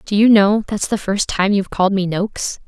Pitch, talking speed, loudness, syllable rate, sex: 200 Hz, 245 wpm, -17 LUFS, 5.7 syllables/s, female